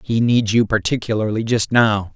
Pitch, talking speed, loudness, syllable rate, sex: 110 Hz, 165 wpm, -18 LUFS, 4.9 syllables/s, male